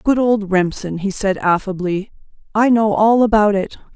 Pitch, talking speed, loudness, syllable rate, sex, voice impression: 205 Hz, 165 wpm, -16 LUFS, 4.6 syllables/s, female, very feminine, adult-like, slightly middle-aged, thin, tensed, slightly weak, slightly dark, hard, clear, slightly fluent, slightly raspy, cool, very intellectual, slightly refreshing, very sincere, very calm, slightly friendly, reassuring, unique, elegant, slightly sweet, slightly lively, strict, sharp, slightly modest, slightly light